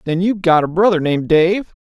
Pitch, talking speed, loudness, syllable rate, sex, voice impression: 175 Hz, 230 wpm, -15 LUFS, 6.2 syllables/s, male, masculine, adult-like, tensed, powerful, slightly bright, slightly muffled, raspy, friendly, unique, wild, slightly intense